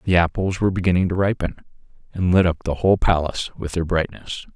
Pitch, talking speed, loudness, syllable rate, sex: 90 Hz, 195 wpm, -21 LUFS, 6.5 syllables/s, male